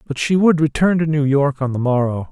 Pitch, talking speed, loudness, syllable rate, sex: 145 Hz, 260 wpm, -17 LUFS, 5.5 syllables/s, male